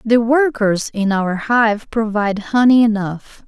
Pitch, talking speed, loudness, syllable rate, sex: 220 Hz, 140 wpm, -16 LUFS, 3.9 syllables/s, female